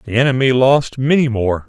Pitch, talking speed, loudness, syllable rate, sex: 125 Hz, 180 wpm, -15 LUFS, 4.9 syllables/s, male